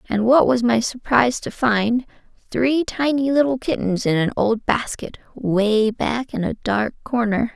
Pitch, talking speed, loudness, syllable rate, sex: 235 Hz, 165 wpm, -20 LUFS, 4.1 syllables/s, female